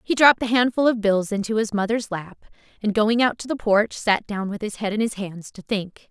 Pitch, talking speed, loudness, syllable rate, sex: 215 Hz, 255 wpm, -22 LUFS, 5.4 syllables/s, female